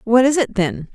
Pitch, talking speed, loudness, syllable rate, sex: 235 Hz, 255 wpm, -17 LUFS, 4.8 syllables/s, female